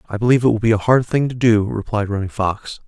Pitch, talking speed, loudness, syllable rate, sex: 110 Hz, 270 wpm, -17 LUFS, 6.4 syllables/s, male